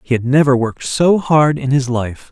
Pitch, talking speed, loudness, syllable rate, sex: 135 Hz, 235 wpm, -15 LUFS, 5.0 syllables/s, male